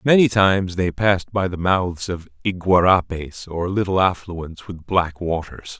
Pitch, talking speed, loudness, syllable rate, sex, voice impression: 90 Hz, 155 wpm, -20 LUFS, 4.3 syllables/s, male, very masculine, very adult-like, middle-aged, tensed, powerful, bright, slightly soft, slightly muffled, fluent, cool, very intellectual, slightly refreshing, sincere, calm, very mature, friendly, reassuring, elegant, slightly wild, sweet, slightly lively, slightly strict, slightly intense